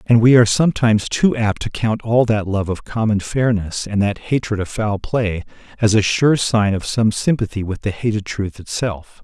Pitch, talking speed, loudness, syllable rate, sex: 110 Hz, 210 wpm, -18 LUFS, 4.9 syllables/s, male